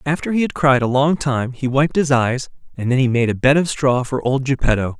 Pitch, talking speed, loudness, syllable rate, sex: 135 Hz, 265 wpm, -18 LUFS, 5.4 syllables/s, male